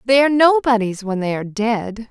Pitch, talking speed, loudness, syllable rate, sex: 230 Hz, 200 wpm, -17 LUFS, 5.5 syllables/s, female